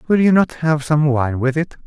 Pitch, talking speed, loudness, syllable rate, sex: 150 Hz, 255 wpm, -17 LUFS, 4.9 syllables/s, male